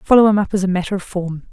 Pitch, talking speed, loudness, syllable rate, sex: 190 Hz, 315 wpm, -17 LUFS, 6.9 syllables/s, female